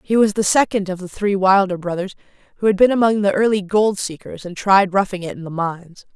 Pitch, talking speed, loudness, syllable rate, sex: 195 Hz, 235 wpm, -18 LUFS, 5.8 syllables/s, female